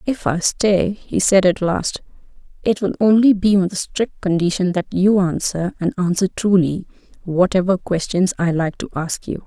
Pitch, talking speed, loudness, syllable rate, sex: 185 Hz, 165 wpm, -18 LUFS, 4.6 syllables/s, female